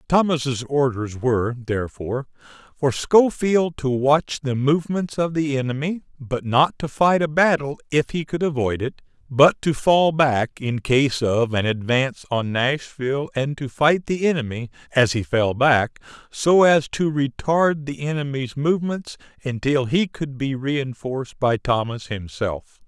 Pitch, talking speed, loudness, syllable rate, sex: 140 Hz, 155 wpm, -21 LUFS, 4.3 syllables/s, male